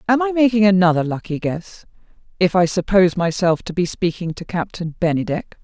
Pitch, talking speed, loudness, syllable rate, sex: 185 Hz, 170 wpm, -18 LUFS, 5.7 syllables/s, female